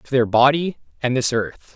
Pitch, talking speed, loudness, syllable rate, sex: 125 Hz, 205 wpm, -19 LUFS, 4.7 syllables/s, male